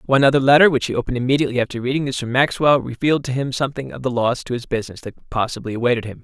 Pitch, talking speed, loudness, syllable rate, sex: 130 Hz, 250 wpm, -19 LUFS, 7.8 syllables/s, male